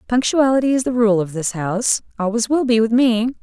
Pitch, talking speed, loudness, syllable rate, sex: 230 Hz, 195 wpm, -17 LUFS, 5.7 syllables/s, female